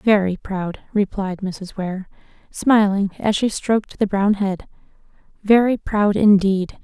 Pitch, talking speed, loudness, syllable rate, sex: 200 Hz, 125 wpm, -19 LUFS, 3.8 syllables/s, female